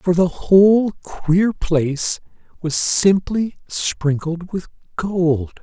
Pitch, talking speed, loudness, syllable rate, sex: 175 Hz, 105 wpm, -18 LUFS, 2.9 syllables/s, male